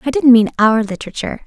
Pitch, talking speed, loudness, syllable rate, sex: 235 Hz, 205 wpm, -14 LUFS, 7.3 syllables/s, female